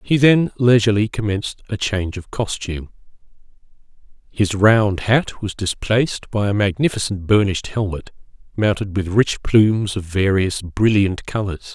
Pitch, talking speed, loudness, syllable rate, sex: 105 Hz, 135 wpm, -18 LUFS, 4.8 syllables/s, male